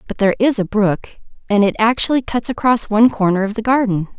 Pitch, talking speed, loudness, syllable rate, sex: 220 Hz, 200 wpm, -16 LUFS, 6.3 syllables/s, female